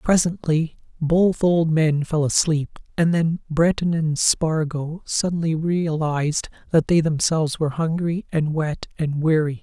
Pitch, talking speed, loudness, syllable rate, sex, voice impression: 160 Hz, 135 wpm, -21 LUFS, 4.2 syllables/s, male, masculine, adult-like, slightly soft, slightly cool, slightly refreshing, sincere, slightly unique